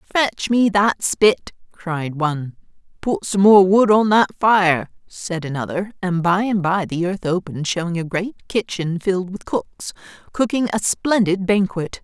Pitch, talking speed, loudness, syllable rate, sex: 190 Hz, 165 wpm, -19 LUFS, 4.2 syllables/s, female